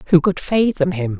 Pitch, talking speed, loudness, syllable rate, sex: 175 Hz, 200 wpm, -18 LUFS, 5.3 syllables/s, female